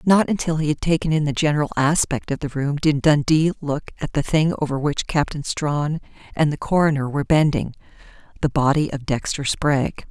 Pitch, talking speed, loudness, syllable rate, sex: 150 Hz, 185 wpm, -21 LUFS, 5.4 syllables/s, female